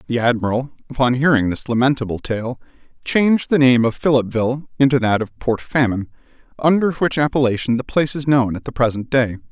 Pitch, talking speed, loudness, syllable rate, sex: 130 Hz, 175 wpm, -18 LUFS, 6.1 syllables/s, male